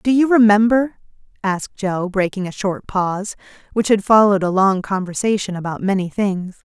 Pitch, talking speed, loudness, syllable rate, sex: 200 Hz, 160 wpm, -18 LUFS, 5.2 syllables/s, female